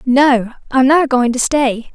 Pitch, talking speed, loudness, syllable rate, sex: 260 Hz, 185 wpm, -14 LUFS, 3.6 syllables/s, female